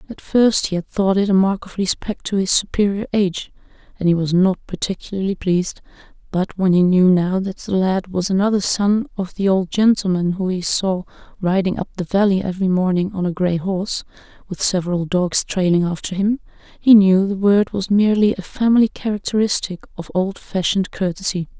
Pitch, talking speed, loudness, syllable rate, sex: 190 Hz, 180 wpm, -18 LUFS, 5.4 syllables/s, female